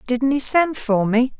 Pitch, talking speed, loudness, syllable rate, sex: 250 Hz, 215 wpm, -18 LUFS, 4.1 syllables/s, female